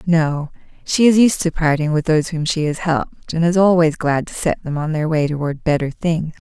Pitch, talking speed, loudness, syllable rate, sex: 160 Hz, 230 wpm, -18 LUFS, 5.2 syllables/s, female